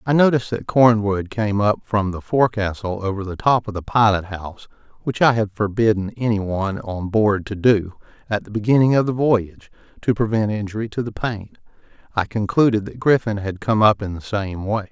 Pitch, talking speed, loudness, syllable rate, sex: 105 Hz, 195 wpm, -20 LUFS, 5.4 syllables/s, male